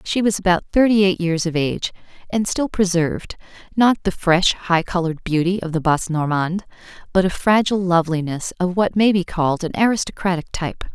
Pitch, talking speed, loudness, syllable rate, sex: 180 Hz, 180 wpm, -19 LUFS, 5.9 syllables/s, female